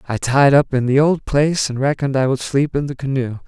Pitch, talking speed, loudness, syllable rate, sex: 135 Hz, 260 wpm, -17 LUFS, 5.8 syllables/s, male